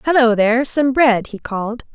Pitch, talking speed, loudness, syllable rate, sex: 240 Hz, 185 wpm, -16 LUFS, 5.3 syllables/s, female